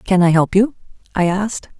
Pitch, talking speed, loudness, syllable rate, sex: 195 Hz, 200 wpm, -17 LUFS, 5.8 syllables/s, female